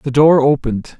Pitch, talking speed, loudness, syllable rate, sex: 140 Hz, 180 wpm, -13 LUFS, 5.3 syllables/s, male